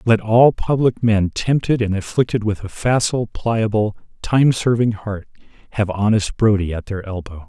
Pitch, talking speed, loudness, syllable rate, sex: 110 Hz, 160 wpm, -18 LUFS, 4.7 syllables/s, male